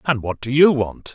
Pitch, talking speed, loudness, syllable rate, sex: 125 Hz, 265 wpm, -18 LUFS, 4.8 syllables/s, male